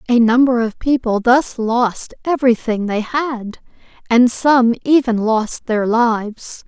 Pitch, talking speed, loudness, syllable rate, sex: 235 Hz, 135 wpm, -16 LUFS, 3.7 syllables/s, female